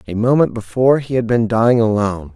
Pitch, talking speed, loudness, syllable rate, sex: 115 Hz, 205 wpm, -16 LUFS, 6.3 syllables/s, male